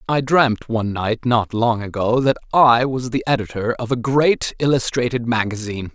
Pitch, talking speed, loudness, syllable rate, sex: 120 Hz, 170 wpm, -19 LUFS, 4.9 syllables/s, male